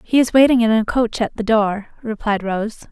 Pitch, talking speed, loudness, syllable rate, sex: 220 Hz, 225 wpm, -17 LUFS, 4.9 syllables/s, female